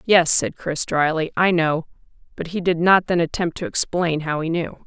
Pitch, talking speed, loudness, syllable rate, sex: 165 Hz, 210 wpm, -20 LUFS, 4.7 syllables/s, female